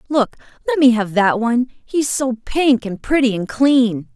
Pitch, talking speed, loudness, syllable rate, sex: 245 Hz, 200 wpm, -17 LUFS, 4.6 syllables/s, female